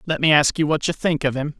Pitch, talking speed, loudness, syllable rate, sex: 150 Hz, 340 wpm, -19 LUFS, 6.2 syllables/s, male